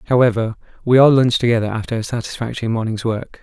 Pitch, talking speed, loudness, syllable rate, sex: 115 Hz, 175 wpm, -17 LUFS, 6.8 syllables/s, male